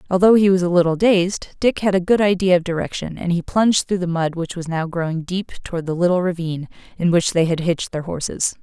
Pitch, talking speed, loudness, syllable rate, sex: 175 Hz, 245 wpm, -19 LUFS, 6.0 syllables/s, female